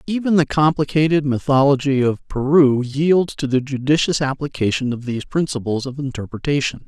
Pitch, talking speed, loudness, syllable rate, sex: 140 Hz, 140 wpm, -18 LUFS, 5.4 syllables/s, male